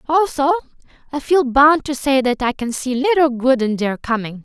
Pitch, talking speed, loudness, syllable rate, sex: 270 Hz, 205 wpm, -17 LUFS, 4.8 syllables/s, female